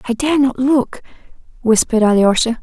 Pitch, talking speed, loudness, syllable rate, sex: 245 Hz, 135 wpm, -15 LUFS, 5.4 syllables/s, female